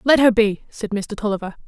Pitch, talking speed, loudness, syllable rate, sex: 215 Hz, 215 wpm, -20 LUFS, 5.6 syllables/s, female